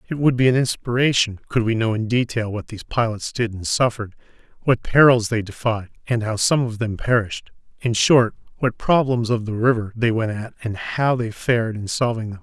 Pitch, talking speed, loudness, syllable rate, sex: 115 Hz, 205 wpm, -20 LUFS, 5.5 syllables/s, male